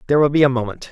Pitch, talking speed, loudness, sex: 135 Hz, 330 wpm, -17 LUFS, male